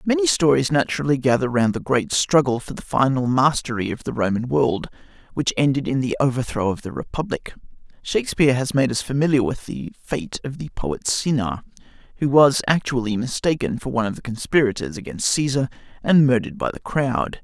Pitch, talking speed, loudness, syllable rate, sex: 135 Hz, 180 wpm, -21 LUFS, 5.7 syllables/s, male